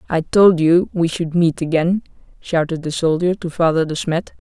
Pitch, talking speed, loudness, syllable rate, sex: 170 Hz, 190 wpm, -17 LUFS, 4.8 syllables/s, female